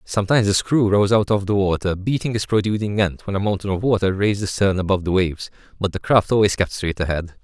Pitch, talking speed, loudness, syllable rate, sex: 100 Hz, 240 wpm, -20 LUFS, 6.4 syllables/s, male